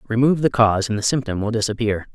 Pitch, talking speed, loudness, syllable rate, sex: 115 Hz, 225 wpm, -19 LUFS, 6.9 syllables/s, male